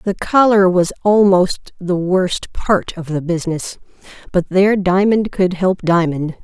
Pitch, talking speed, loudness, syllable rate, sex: 185 Hz, 150 wpm, -16 LUFS, 4.1 syllables/s, female